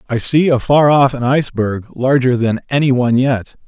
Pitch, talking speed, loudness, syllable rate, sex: 130 Hz, 180 wpm, -14 LUFS, 5.2 syllables/s, male